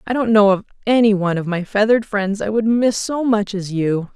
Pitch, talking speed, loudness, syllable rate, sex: 210 Hz, 245 wpm, -17 LUFS, 5.5 syllables/s, female